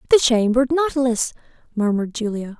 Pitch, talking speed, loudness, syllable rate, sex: 240 Hz, 115 wpm, -20 LUFS, 6.4 syllables/s, female